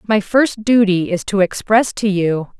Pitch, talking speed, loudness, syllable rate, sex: 200 Hz, 185 wpm, -16 LUFS, 4.0 syllables/s, female